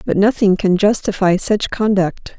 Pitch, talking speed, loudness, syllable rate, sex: 200 Hz, 150 wpm, -16 LUFS, 4.4 syllables/s, female